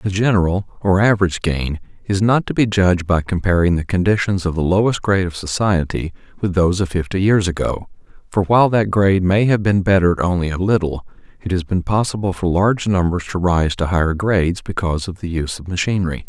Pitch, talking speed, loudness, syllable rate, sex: 95 Hz, 205 wpm, -18 LUFS, 6.1 syllables/s, male